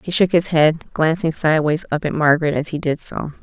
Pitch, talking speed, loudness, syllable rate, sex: 160 Hz, 230 wpm, -18 LUFS, 5.6 syllables/s, female